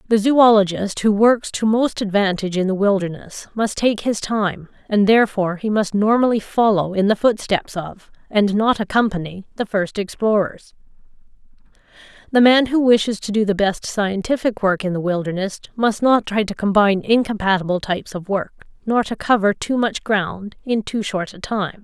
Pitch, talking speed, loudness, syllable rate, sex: 210 Hz, 175 wpm, -18 LUFS, 5.0 syllables/s, female